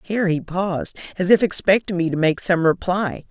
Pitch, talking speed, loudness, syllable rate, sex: 180 Hz, 200 wpm, -20 LUFS, 5.4 syllables/s, female